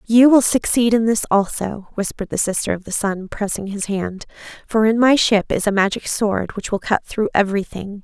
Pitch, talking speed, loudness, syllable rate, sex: 205 Hz, 210 wpm, -18 LUFS, 5.2 syllables/s, female